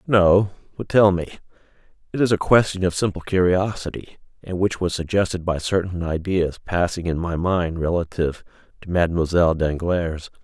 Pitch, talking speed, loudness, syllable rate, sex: 90 Hz, 145 wpm, -21 LUFS, 5.2 syllables/s, male